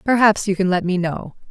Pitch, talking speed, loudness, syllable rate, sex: 195 Hz, 240 wpm, -18 LUFS, 5.4 syllables/s, female